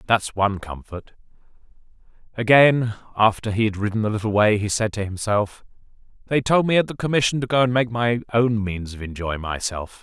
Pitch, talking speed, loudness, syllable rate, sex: 110 Hz, 185 wpm, -21 LUFS, 5.5 syllables/s, male